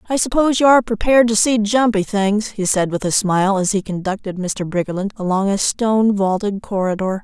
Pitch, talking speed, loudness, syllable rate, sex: 205 Hz, 200 wpm, -17 LUFS, 5.7 syllables/s, female